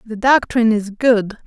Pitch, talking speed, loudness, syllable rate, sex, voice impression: 225 Hz, 165 wpm, -16 LUFS, 4.6 syllables/s, female, feminine, slightly adult-like, slightly refreshing, sincere, friendly, kind